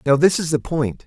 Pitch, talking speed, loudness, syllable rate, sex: 150 Hz, 280 wpm, -19 LUFS, 5.3 syllables/s, male